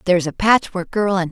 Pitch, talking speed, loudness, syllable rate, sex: 185 Hz, 230 wpm, -18 LUFS, 6.0 syllables/s, female